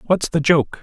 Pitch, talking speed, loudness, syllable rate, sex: 155 Hz, 215 wpm, -18 LUFS, 4.8 syllables/s, male